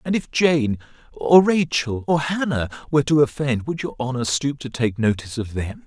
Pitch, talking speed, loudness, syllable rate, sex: 135 Hz, 195 wpm, -21 LUFS, 5.1 syllables/s, male